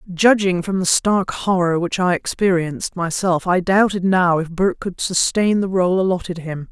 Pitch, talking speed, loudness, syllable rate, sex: 185 Hz, 180 wpm, -18 LUFS, 4.7 syllables/s, female